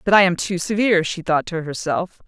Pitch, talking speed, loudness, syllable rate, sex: 175 Hz, 235 wpm, -20 LUFS, 5.6 syllables/s, female